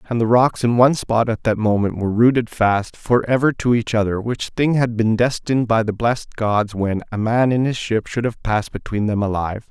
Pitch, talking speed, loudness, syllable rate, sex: 115 Hz, 235 wpm, -19 LUFS, 5.4 syllables/s, male